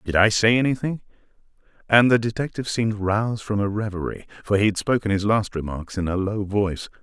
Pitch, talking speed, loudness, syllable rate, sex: 105 Hz, 195 wpm, -22 LUFS, 6.0 syllables/s, male